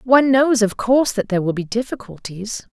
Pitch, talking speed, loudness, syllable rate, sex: 225 Hz, 195 wpm, -18 LUFS, 5.7 syllables/s, female